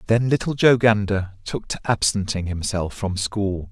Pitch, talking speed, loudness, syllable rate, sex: 105 Hz, 160 wpm, -21 LUFS, 4.4 syllables/s, male